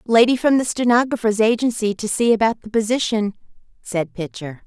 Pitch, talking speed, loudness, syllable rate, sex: 220 Hz, 155 wpm, -19 LUFS, 5.4 syllables/s, female